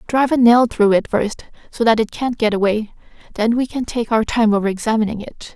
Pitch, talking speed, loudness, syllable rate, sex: 225 Hz, 225 wpm, -17 LUFS, 5.7 syllables/s, female